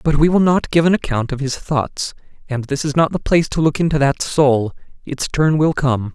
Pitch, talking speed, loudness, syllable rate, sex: 145 Hz, 235 wpm, -17 LUFS, 5.2 syllables/s, male